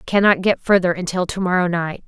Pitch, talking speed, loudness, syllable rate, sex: 180 Hz, 205 wpm, -18 LUFS, 5.6 syllables/s, female